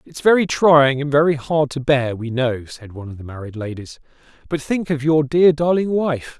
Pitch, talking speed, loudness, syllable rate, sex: 140 Hz, 215 wpm, -18 LUFS, 5.0 syllables/s, male